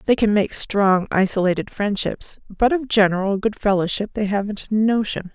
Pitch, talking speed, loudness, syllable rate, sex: 205 Hz, 170 wpm, -20 LUFS, 5.0 syllables/s, female